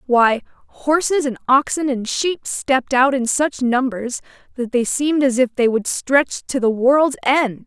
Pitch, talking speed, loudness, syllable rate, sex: 260 Hz, 180 wpm, -18 LUFS, 4.3 syllables/s, female